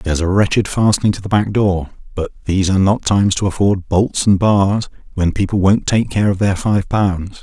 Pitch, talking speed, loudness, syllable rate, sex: 100 Hz, 220 wpm, -16 LUFS, 5.3 syllables/s, male